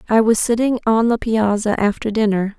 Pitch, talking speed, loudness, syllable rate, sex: 220 Hz, 185 wpm, -17 LUFS, 5.1 syllables/s, female